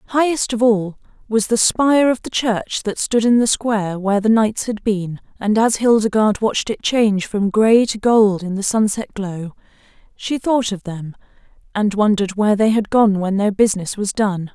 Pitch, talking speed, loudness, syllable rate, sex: 215 Hz, 200 wpm, -17 LUFS, 4.9 syllables/s, female